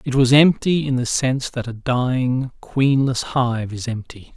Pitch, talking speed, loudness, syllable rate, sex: 125 Hz, 180 wpm, -19 LUFS, 4.3 syllables/s, male